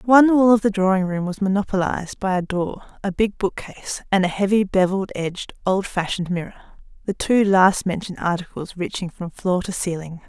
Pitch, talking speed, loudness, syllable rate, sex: 190 Hz, 175 wpm, -21 LUFS, 5.8 syllables/s, female